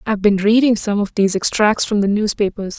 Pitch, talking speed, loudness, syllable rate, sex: 210 Hz, 215 wpm, -16 LUFS, 6.1 syllables/s, female